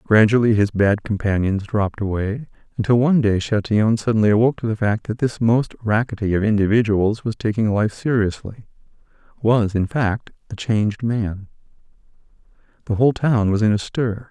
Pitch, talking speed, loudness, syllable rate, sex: 110 Hz, 155 wpm, -19 LUFS, 5.4 syllables/s, male